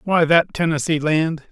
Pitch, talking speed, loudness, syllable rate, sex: 160 Hz, 160 wpm, -18 LUFS, 4.6 syllables/s, male